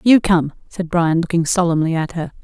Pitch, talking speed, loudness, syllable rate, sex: 170 Hz, 195 wpm, -17 LUFS, 5.2 syllables/s, female